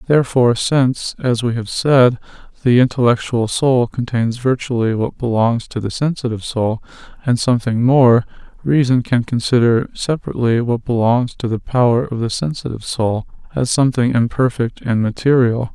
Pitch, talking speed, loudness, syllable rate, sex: 120 Hz, 145 wpm, -17 LUFS, 5.2 syllables/s, male